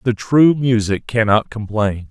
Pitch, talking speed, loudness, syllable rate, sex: 115 Hz, 145 wpm, -16 LUFS, 4.0 syllables/s, male